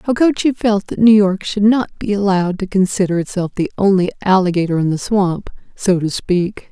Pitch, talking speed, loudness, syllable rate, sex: 195 Hz, 190 wpm, -16 LUFS, 5.3 syllables/s, female